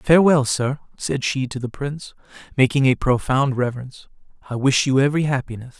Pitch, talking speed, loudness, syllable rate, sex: 135 Hz, 165 wpm, -20 LUFS, 5.9 syllables/s, male